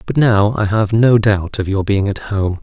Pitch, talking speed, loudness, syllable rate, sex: 105 Hz, 250 wpm, -15 LUFS, 4.5 syllables/s, male